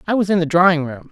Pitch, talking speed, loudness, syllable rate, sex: 175 Hz, 320 wpm, -16 LUFS, 7.2 syllables/s, female